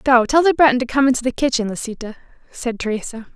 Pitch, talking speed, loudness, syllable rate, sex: 250 Hz, 215 wpm, -18 LUFS, 6.7 syllables/s, female